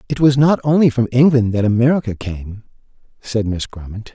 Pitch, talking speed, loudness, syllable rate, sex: 120 Hz, 175 wpm, -16 LUFS, 5.3 syllables/s, male